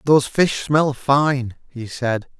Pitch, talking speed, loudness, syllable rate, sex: 130 Hz, 150 wpm, -19 LUFS, 3.4 syllables/s, male